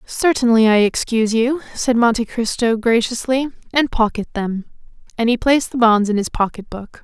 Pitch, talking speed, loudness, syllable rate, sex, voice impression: 230 Hz, 170 wpm, -17 LUFS, 5.2 syllables/s, female, very feminine, adult-like, slightly fluent, friendly, slightly sweet